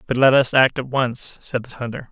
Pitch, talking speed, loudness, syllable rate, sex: 125 Hz, 255 wpm, -19 LUFS, 5.2 syllables/s, male